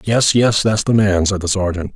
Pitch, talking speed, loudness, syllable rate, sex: 100 Hz, 245 wpm, -15 LUFS, 4.9 syllables/s, male